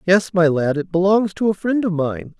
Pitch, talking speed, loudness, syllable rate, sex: 180 Hz, 250 wpm, -18 LUFS, 5.0 syllables/s, male